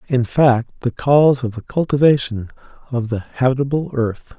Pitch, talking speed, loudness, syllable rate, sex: 125 Hz, 150 wpm, -18 LUFS, 4.7 syllables/s, male